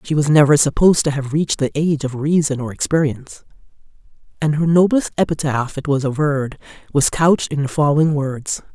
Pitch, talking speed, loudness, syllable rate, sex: 145 Hz, 180 wpm, -17 LUFS, 6.0 syllables/s, female